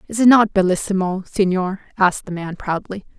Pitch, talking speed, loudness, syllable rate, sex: 190 Hz, 150 wpm, -18 LUFS, 5.6 syllables/s, female